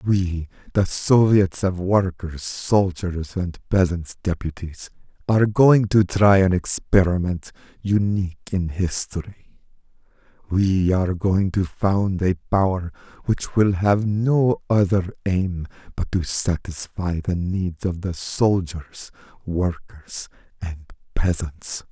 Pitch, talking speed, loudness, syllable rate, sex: 95 Hz, 115 wpm, -21 LUFS, 3.8 syllables/s, male